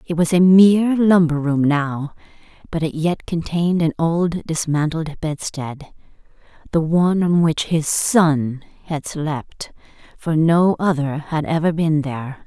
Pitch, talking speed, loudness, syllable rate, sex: 160 Hz, 145 wpm, -18 LUFS, 4.0 syllables/s, female